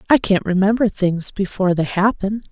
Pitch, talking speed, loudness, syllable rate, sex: 195 Hz, 165 wpm, -18 LUFS, 5.3 syllables/s, female